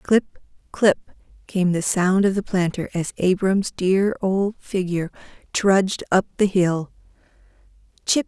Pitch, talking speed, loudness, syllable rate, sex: 190 Hz, 130 wpm, -21 LUFS, 4.2 syllables/s, female